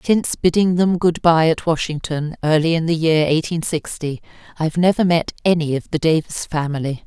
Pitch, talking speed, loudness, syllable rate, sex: 160 Hz, 185 wpm, -18 LUFS, 5.4 syllables/s, female